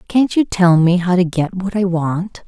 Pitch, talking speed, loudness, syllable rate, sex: 185 Hz, 245 wpm, -16 LUFS, 4.3 syllables/s, female